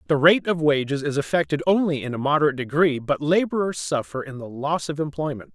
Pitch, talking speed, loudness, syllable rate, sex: 145 Hz, 205 wpm, -22 LUFS, 6.1 syllables/s, male